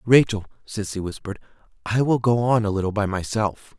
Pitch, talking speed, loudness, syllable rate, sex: 110 Hz, 175 wpm, -22 LUFS, 5.7 syllables/s, male